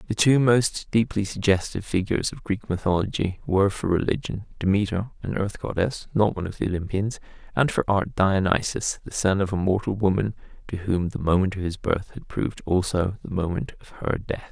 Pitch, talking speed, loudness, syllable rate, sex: 100 Hz, 190 wpm, -24 LUFS, 5.5 syllables/s, male